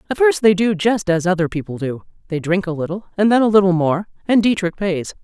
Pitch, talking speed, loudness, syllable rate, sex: 185 Hz, 240 wpm, -18 LUFS, 5.8 syllables/s, female